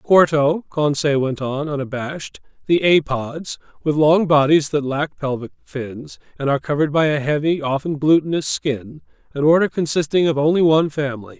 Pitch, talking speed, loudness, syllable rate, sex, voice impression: 150 Hz, 160 wpm, -19 LUFS, 5.1 syllables/s, male, masculine, middle-aged, slightly thick, sincere, slightly elegant, slightly kind